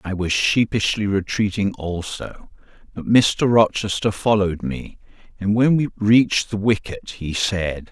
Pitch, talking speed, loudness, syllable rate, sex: 100 Hz, 135 wpm, -20 LUFS, 4.2 syllables/s, male